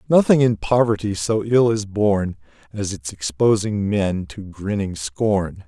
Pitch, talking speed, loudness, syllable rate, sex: 110 Hz, 150 wpm, -20 LUFS, 4.2 syllables/s, male